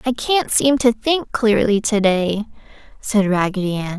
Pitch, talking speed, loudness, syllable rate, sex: 220 Hz, 165 wpm, -18 LUFS, 4.2 syllables/s, female